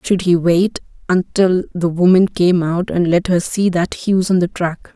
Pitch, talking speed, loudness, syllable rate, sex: 180 Hz, 220 wpm, -16 LUFS, 4.5 syllables/s, female